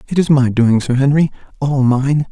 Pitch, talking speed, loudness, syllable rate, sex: 135 Hz, 180 wpm, -14 LUFS, 4.9 syllables/s, male